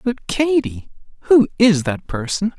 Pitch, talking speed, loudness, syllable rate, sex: 195 Hz, 140 wpm, -17 LUFS, 4.1 syllables/s, male